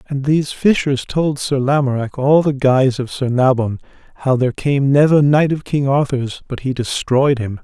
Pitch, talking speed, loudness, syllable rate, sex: 135 Hz, 190 wpm, -16 LUFS, 4.9 syllables/s, male